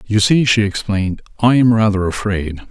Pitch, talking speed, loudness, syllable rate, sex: 105 Hz, 175 wpm, -15 LUFS, 5.1 syllables/s, male